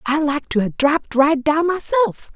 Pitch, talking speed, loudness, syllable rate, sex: 275 Hz, 205 wpm, -18 LUFS, 4.5 syllables/s, female